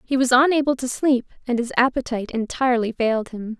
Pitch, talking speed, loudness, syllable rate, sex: 250 Hz, 185 wpm, -21 LUFS, 6.1 syllables/s, female